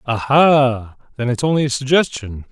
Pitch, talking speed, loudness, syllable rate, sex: 125 Hz, 145 wpm, -16 LUFS, 4.7 syllables/s, male